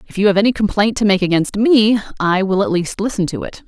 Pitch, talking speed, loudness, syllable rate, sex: 200 Hz, 245 wpm, -16 LUFS, 5.7 syllables/s, female